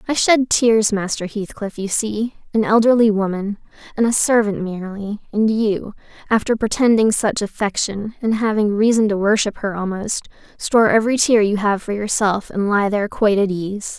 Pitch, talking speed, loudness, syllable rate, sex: 210 Hz, 165 wpm, -18 LUFS, 5.1 syllables/s, female